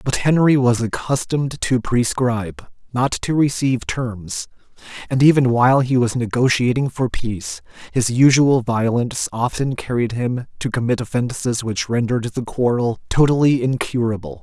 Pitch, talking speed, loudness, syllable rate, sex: 125 Hz, 135 wpm, -19 LUFS, 4.9 syllables/s, male